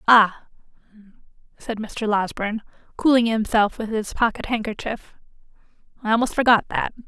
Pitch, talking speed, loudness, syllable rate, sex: 220 Hz, 120 wpm, -22 LUFS, 5.2 syllables/s, female